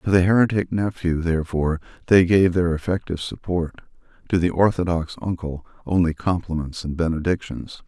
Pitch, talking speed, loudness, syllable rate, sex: 85 Hz, 135 wpm, -22 LUFS, 5.6 syllables/s, male